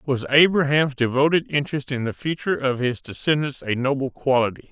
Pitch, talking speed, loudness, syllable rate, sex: 135 Hz, 165 wpm, -21 LUFS, 5.6 syllables/s, male